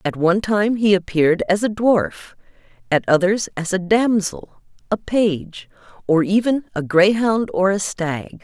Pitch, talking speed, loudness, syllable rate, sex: 195 Hz, 155 wpm, -18 LUFS, 4.3 syllables/s, female